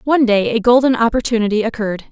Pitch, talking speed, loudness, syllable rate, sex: 230 Hz, 170 wpm, -15 LUFS, 7.1 syllables/s, female